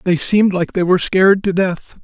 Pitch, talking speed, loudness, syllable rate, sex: 185 Hz, 235 wpm, -15 LUFS, 5.8 syllables/s, male